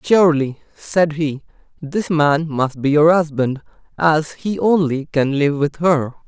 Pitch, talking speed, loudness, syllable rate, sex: 155 Hz, 155 wpm, -17 LUFS, 3.9 syllables/s, male